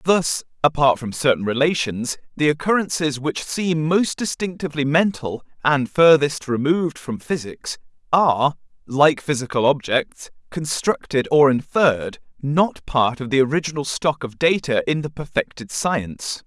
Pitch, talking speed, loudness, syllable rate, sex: 145 Hz, 130 wpm, -20 LUFS, 4.2 syllables/s, male